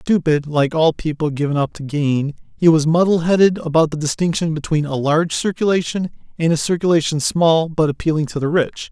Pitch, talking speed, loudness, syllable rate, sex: 160 Hz, 190 wpm, -18 LUFS, 4.8 syllables/s, male